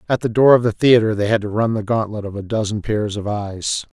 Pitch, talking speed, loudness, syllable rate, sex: 110 Hz, 270 wpm, -18 LUFS, 5.7 syllables/s, male